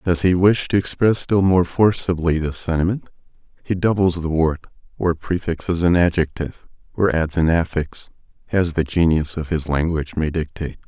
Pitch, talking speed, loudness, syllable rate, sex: 85 Hz, 165 wpm, -20 LUFS, 5.1 syllables/s, male